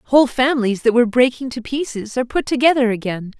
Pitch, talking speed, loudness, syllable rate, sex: 245 Hz, 195 wpm, -18 LUFS, 6.3 syllables/s, female